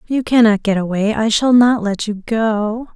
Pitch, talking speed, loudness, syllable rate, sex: 220 Hz, 205 wpm, -15 LUFS, 4.4 syllables/s, female